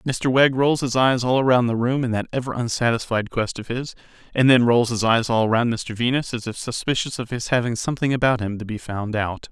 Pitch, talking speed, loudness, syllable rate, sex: 120 Hz, 240 wpm, -21 LUFS, 5.5 syllables/s, male